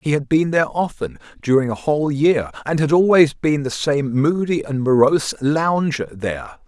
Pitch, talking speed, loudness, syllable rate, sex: 145 Hz, 180 wpm, -18 LUFS, 4.9 syllables/s, male